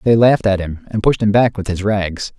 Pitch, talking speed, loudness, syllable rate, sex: 105 Hz, 275 wpm, -16 LUFS, 5.5 syllables/s, male